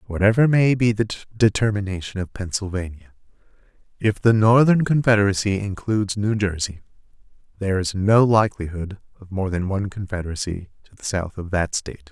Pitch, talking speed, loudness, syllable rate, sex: 100 Hz, 145 wpm, -21 LUFS, 5.6 syllables/s, male